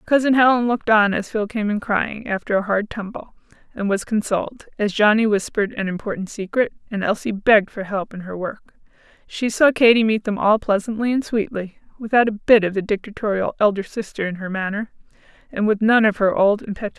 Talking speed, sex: 205 wpm, female